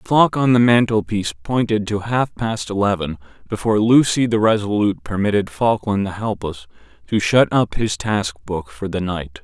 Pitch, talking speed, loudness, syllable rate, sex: 105 Hz, 180 wpm, -19 LUFS, 5.0 syllables/s, male